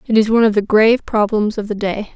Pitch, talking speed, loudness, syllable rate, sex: 215 Hz, 280 wpm, -15 LUFS, 6.4 syllables/s, female